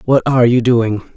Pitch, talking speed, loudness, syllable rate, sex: 120 Hz, 205 wpm, -13 LUFS, 5.1 syllables/s, male